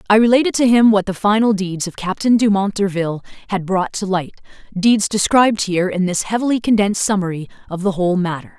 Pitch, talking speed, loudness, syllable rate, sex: 200 Hz, 195 wpm, -17 LUFS, 6.1 syllables/s, female